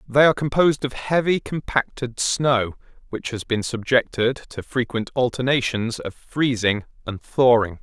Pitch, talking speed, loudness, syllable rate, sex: 125 Hz, 140 wpm, -21 LUFS, 4.5 syllables/s, male